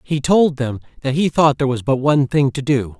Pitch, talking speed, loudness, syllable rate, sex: 140 Hz, 260 wpm, -17 LUFS, 5.6 syllables/s, male